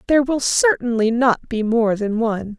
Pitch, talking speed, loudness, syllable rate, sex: 240 Hz, 185 wpm, -18 LUFS, 5.0 syllables/s, female